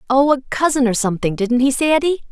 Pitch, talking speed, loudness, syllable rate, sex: 260 Hz, 235 wpm, -17 LUFS, 6.8 syllables/s, female